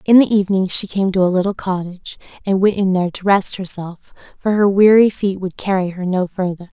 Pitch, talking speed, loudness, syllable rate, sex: 190 Hz, 220 wpm, -17 LUFS, 5.7 syllables/s, female